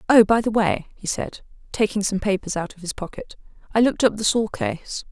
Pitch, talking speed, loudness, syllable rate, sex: 210 Hz, 225 wpm, -22 LUFS, 5.5 syllables/s, female